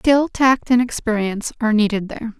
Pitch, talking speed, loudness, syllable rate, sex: 230 Hz, 175 wpm, -18 LUFS, 5.8 syllables/s, female